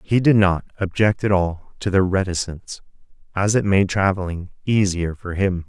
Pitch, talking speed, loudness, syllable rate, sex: 95 Hz, 170 wpm, -20 LUFS, 4.8 syllables/s, male